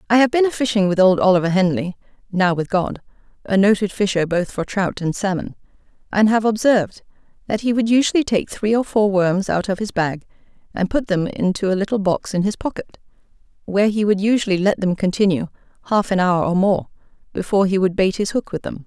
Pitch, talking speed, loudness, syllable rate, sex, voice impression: 200 Hz, 210 wpm, -19 LUFS, 5.8 syllables/s, female, feminine, adult-like, slightly hard, muffled, fluent, slightly raspy, intellectual, elegant, slightly strict, sharp